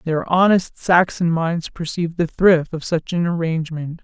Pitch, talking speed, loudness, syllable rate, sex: 170 Hz, 165 wpm, -19 LUFS, 4.6 syllables/s, female